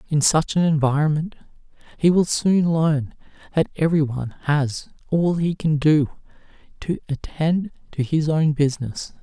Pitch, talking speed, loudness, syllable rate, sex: 155 Hz, 135 wpm, -21 LUFS, 4.5 syllables/s, male